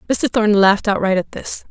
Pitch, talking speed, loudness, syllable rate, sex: 210 Hz, 210 wpm, -16 LUFS, 6.0 syllables/s, female